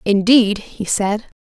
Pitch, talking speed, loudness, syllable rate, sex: 210 Hz, 125 wpm, -16 LUFS, 3.2 syllables/s, female